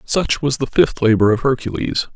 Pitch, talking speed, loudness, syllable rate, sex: 115 Hz, 195 wpm, -17 LUFS, 5.0 syllables/s, male